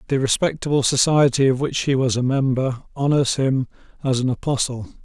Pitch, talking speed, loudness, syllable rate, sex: 135 Hz, 165 wpm, -20 LUFS, 5.3 syllables/s, male